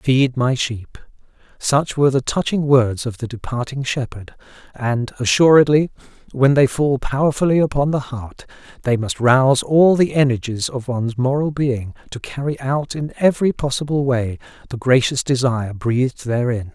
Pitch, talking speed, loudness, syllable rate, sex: 130 Hz, 155 wpm, -18 LUFS, 4.8 syllables/s, male